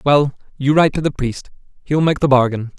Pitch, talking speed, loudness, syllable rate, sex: 140 Hz, 215 wpm, -17 LUFS, 5.7 syllables/s, male